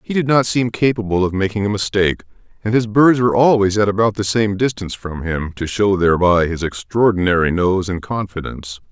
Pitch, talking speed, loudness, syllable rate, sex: 100 Hz, 195 wpm, -17 LUFS, 5.8 syllables/s, male